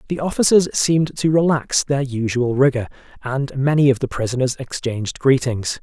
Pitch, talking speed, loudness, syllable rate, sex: 135 Hz, 155 wpm, -19 LUFS, 5.2 syllables/s, male